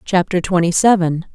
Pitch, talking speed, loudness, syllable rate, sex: 180 Hz, 135 wpm, -16 LUFS, 5.0 syllables/s, female